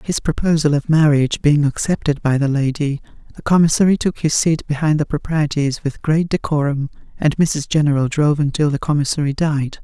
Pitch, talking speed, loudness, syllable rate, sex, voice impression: 150 Hz, 170 wpm, -17 LUFS, 5.5 syllables/s, female, feminine, very adult-like, slightly soft, calm, very elegant, sweet